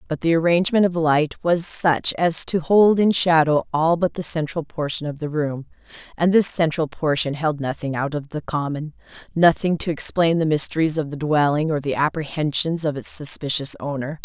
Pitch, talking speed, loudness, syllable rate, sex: 155 Hz, 185 wpm, -20 LUFS, 5.1 syllables/s, female